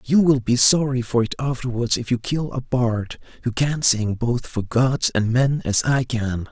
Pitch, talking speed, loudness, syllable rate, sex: 125 Hz, 210 wpm, -21 LUFS, 4.3 syllables/s, male